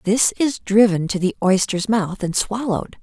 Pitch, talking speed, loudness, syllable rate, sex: 205 Hz, 180 wpm, -19 LUFS, 4.6 syllables/s, female